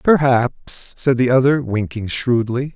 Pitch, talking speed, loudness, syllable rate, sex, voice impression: 125 Hz, 130 wpm, -17 LUFS, 3.8 syllables/s, male, masculine, adult-like, bright, soft, slightly raspy, slightly refreshing, sincere, friendly, reassuring, wild, kind